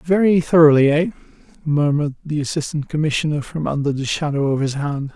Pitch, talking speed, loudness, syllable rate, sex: 150 Hz, 150 wpm, -18 LUFS, 6.0 syllables/s, male